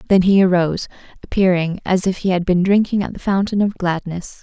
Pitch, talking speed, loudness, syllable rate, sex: 185 Hz, 205 wpm, -17 LUFS, 5.7 syllables/s, female